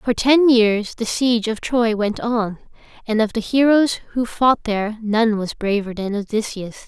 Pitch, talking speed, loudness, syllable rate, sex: 225 Hz, 185 wpm, -19 LUFS, 4.4 syllables/s, female